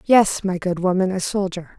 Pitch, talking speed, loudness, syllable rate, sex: 190 Hz, 200 wpm, -20 LUFS, 4.7 syllables/s, female